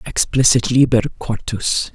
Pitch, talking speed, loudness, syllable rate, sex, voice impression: 120 Hz, 90 wpm, -16 LUFS, 4.3 syllables/s, female, feminine, slightly gender-neutral, adult-like, middle-aged, thin, slightly relaxed, slightly weak, slightly dark, soft, slightly muffled, fluent, cool, very intellectual, refreshing, sincere, very calm, friendly, reassuring, slightly unique, elegant, sweet, slightly lively, very kind, modest